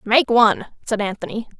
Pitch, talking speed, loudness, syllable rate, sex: 225 Hz, 150 wpm, -19 LUFS, 5.4 syllables/s, female